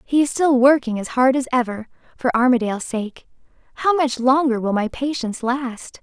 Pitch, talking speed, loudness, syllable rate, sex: 255 Hz, 180 wpm, -19 LUFS, 5.3 syllables/s, female